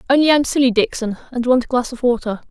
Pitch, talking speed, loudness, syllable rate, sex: 250 Hz, 240 wpm, -17 LUFS, 6.6 syllables/s, female